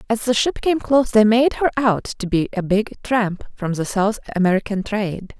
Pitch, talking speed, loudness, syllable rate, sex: 215 Hz, 210 wpm, -19 LUFS, 5.1 syllables/s, female